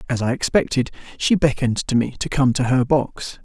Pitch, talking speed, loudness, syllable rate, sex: 130 Hz, 210 wpm, -20 LUFS, 5.4 syllables/s, male